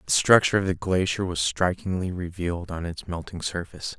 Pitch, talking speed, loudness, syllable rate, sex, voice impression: 90 Hz, 180 wpm, -25 LUFS, 5.7 syllables/s, male, very masculine, slightly middle-aged, thick, slightly relaxed, powerful, slightly dark, soft, slightly muffled, slightly halting, slightly cool, slightly intellectual, very sincere, very calm, slightly mature, slightly friendly, slightly reassuring, very unique, slightly elegant, wild, slightly sweet, very kind, very modest